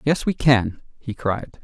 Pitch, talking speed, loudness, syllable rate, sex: 125 Hz, 185 wpm, -21 LUFS, 3.7 syllables/s, male